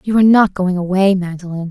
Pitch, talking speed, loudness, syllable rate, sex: 190 Hz, 210 wpm, -14 LUFS, 6.2 syllables/s, female